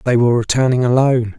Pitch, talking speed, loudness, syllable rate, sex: 120 Hz, 175 wpm, -15 LUFS, 7.1 syllables/s, male